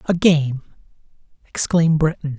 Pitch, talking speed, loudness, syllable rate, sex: 155 Hz, 100 wpm, -18 LUFS, 4.9 syllables/s, male